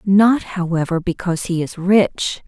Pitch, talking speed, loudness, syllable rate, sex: 185 Hz, 145 wpm, -18 LUFS, 4.3 syllables/s, female